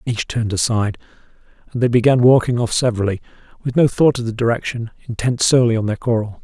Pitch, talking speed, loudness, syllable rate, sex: 115 Hz, 185 wpm, -17 LUFS, 6.9 syllables/s, male